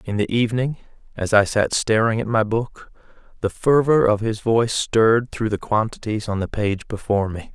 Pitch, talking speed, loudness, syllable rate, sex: 110 Hz, 190 wpm, -20 LUFS, 5.2 syllables/s, male